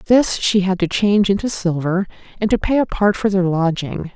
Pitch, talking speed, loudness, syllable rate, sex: 195 Hz, 215 wpm, -18 LUFS, 5.2 syllables/s, female